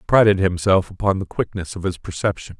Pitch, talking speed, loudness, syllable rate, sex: 95 Hz, 210 wpm, -20 LUFS, 6.3 syllables/s, male